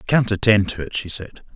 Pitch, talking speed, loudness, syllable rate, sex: 100 Hz, 270 wpm, -20 LUFS, 5.7 syllables/s, male